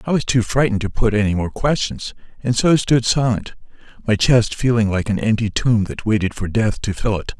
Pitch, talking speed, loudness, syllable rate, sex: 110 Hz, 210 wpm, -18 LUFS, 5.4 syllables/s, male